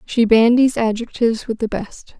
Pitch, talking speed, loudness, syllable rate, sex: 230 Hz, 165 wpm, -17 LUFS, 4.9 syllables/s, female